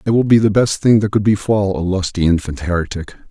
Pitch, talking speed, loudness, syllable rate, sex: 100 Hz, 235 wpm, -16 LUFS, 5.9 syllables/s, male